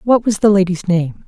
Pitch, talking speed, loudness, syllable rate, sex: 190 Hz, 235 wpm, -15 LUFS, 5.1 syllables/s, male